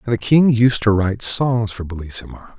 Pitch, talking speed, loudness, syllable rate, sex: 110 Hz, 210 wpm, -17 LUFS, 5.3 syllables/s, male